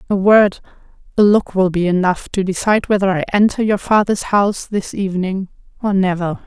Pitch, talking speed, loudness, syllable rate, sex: 195 Hz, 175 wpm, -16 LUFS, 5.5 syllables/s, female